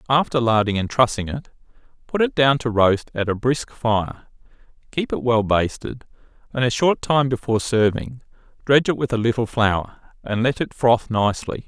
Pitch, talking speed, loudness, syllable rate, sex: 120 Hz, 180 wpm, -20 LUFS, 5.0 syllables/s, male